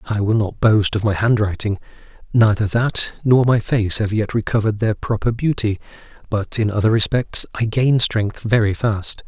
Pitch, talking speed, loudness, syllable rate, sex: 110 Hz, 175 wpm, -18 LUFS, 4.9 syllables/s, male